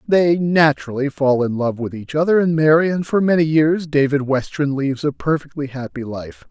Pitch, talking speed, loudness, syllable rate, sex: 145 Hz, 195 wpm, -18 LUFS, 5.0 syllables/s, male